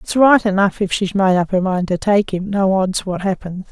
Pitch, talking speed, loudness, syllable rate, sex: 195 Hz, 260 wpm, -17 LUFS, 5.0 syllables/s, female